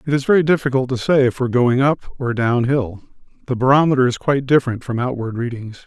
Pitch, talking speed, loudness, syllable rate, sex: 130 Hz, 225 wpm, -18 LUFS, 6.8 syllables/s, male